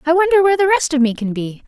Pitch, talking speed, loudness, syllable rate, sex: 310 Hz, 320 wpm, -15 LUFS, 7.1 syllables/s, female